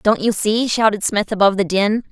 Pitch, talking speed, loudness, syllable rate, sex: 210 Hz, 225 wpm, -17 LUFS, 5.5 syllables/s, female